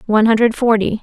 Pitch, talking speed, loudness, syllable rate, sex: 225 Hz, 175 wpm, -14 LUFS, 6.9 syllables/s, female